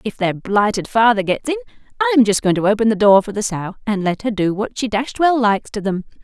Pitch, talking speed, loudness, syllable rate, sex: 220 Hz, 260 wpm, -17 LUFS, 5.9 syllables/s, female